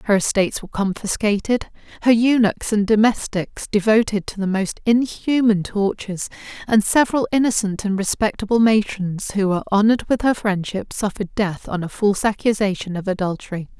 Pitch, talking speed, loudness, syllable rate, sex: 210 Hz, 150 wpm, -20 LUFS, 5.5 syllables/s, female